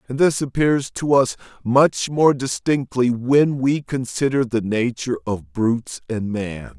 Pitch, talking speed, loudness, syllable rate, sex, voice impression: 130 Hz, 150 wpm, -20 LUFS, 4.1 syllables/s, male, very masculine, very adult-like, slightly old, very thick, tensed, powerful, slightly bright, hard, clear, slightly fluent, cool, slightly intellectual, slightly refreshing, sincere, very calm, friendly, reassuring, unique, wild, slightly sweet, slightly lively, kind